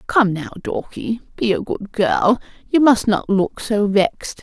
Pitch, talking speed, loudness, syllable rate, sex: 215 Hz, 165 wpm, -19 LUFS, 4.1 syllables/s, female